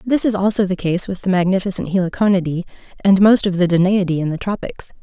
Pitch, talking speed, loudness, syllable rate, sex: 190 Hz, 205 wpm, -17 LUFS, 6.3 syllables/s, female